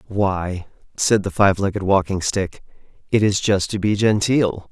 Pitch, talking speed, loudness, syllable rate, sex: 100 Hz, 165 wpm, -19 LUFS, 4.3 syllables/s, male